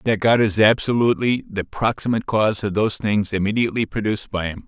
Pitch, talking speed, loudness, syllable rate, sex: 105 Hz, 180 wpm, -20 LUFS, 6.4 syllables/s, male